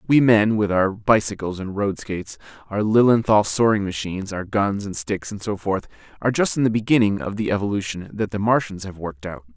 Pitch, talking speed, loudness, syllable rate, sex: 100 Hz, 205 wpm, -21 LUFS, 5.7 syllables/s, male